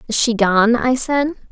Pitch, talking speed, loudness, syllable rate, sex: 240 Hz, 200 wpm, -16 LUFS, 4.4 syllables/s, female